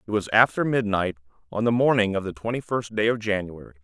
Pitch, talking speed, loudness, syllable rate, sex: 105 Hz, 220 wpm, -23 LUFS, 6.1 syllables/s, male